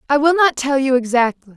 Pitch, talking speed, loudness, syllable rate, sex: 270 Hz, 230 wpm, -16 LUFS, 5.8 syllables/s, female